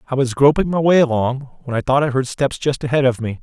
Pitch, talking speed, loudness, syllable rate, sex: 135 Hz, 280 wpm, -17 LUFS, 6.2 syllables/s, male